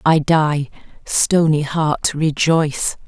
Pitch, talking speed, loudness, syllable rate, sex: 155 Hz, 100 wpm, -17 LUFS, 3.1 syllables/s, female